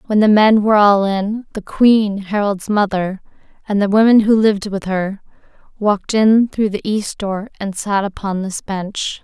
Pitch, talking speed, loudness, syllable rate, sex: 205 Hz, 180 wpm, -16 LUFS, 4.4 syllables/s, female